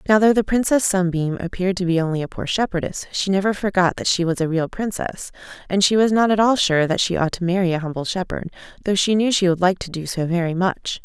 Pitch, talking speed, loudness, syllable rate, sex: 185 Hz, 255 wpm, -20 LUFS, 6.1 syllables/s, female